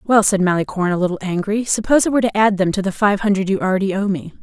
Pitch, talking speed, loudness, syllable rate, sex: 200 Hz, 270 wpm, -17 LUFS, 7.2 syllables/s, female